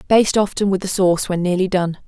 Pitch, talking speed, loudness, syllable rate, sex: 185 Hz, 230 wpm, -18 LUFS, 6.5 syllables/s, female